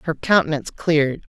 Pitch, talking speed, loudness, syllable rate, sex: 155 Hz, 135 wpm, -20 LUFS, 5.6 syllables/s, female